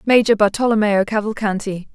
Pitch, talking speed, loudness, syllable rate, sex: 210 Hz, 90 wpm, -17 LUFS, 5.5 syllables/s, female